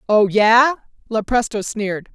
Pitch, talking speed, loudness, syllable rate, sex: 220 Hz, 110 wpm, -17 LUFS, 4.3 syllables/s, female